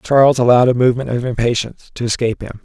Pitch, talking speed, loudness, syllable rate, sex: 120 Hz, 205 wpm, -15 LUFS, 7.6 syllables/s, male